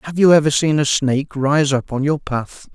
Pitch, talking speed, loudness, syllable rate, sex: 145 Hz, 240 wpm, -17 LUFS, 5.0 syllables/s, male